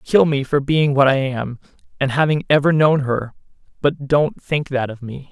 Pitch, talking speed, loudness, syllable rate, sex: 140 Hz, 205 wpm, -18 LUFS, 4.6 syllables/s, male